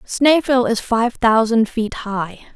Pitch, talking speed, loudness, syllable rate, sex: 230 Hz, 140 wpm, -17 LUFS, 3.4 syllables/s, female